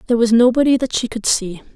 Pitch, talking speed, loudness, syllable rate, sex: 235 Hz, 240 wpm, -16 LUFS, 6.8 syllables/s, female